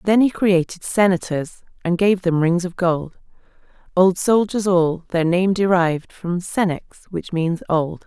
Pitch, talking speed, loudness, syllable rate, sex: 180 Hz, 155 wpm, -19 LUFS, 3.9 syllables/s, female